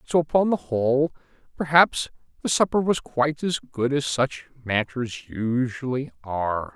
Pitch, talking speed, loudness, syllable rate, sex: 135 Hz, 140 wpm, -24 LUFS, 4.5 syllables/s, male